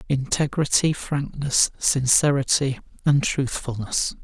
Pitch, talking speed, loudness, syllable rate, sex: 140 Hz, 70 wpm, -22 LUFS, 3.8 syllables/s, male